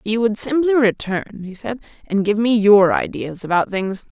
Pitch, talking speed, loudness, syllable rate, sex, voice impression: 215 Hz, 185 wpm, -18 LUFS, 4.8 syllables/s, female, feminine, adult-like, tensed, powerful, clear, intellectual, calm, friendly, slightly elegant, lively, sharp